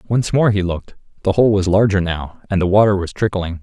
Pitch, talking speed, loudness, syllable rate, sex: 95 Hz, 230 wpm, -17 LUFS, 5.8 syllables/s, male